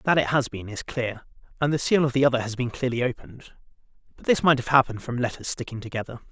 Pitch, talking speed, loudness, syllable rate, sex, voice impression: 125 Hz, 240 wpm, -24 LUFS, 6.7 syllables/s, male, masculine, adult-like, tensed, powerful, slightly hard, clear, raspy, friendly, slightly unique, wild, lively, intense